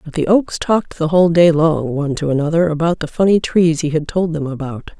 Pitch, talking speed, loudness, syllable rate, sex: 160 Hz, 240 wpm, -16 LUFS, 5.7 syllables/s, female